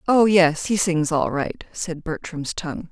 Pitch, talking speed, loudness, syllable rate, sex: 170 Hz, 185 wpm, -21 LUFS, 4.2 syllables/s, female